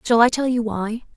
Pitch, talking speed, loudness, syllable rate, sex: 230 Hz, 260 wpm, -20 LUFS, 5.3 syllables/s, female